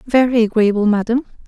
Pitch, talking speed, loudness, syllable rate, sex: 230 Hz, 120 wpm, -16 LUFS, 6.1 syllables/s, female